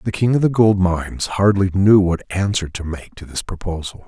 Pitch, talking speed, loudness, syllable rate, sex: 95 Hz, 220 wpm, -18 LUFS, 5.1 syllables/s, male